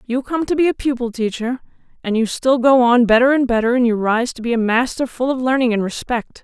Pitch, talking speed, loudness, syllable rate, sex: 245 Hz, 250 wpm, -17 LUFS, 5.8 syllables/s, female